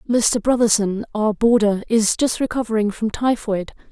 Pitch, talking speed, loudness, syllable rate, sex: 220 Hz, 140 wpm, -19 LUFS, 4.7 syllables/s, female